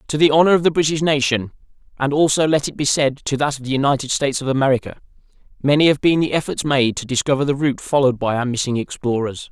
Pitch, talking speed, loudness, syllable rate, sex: 140 Hz, 225 wpm, -18 LUFS, 6.7 syllables/s, male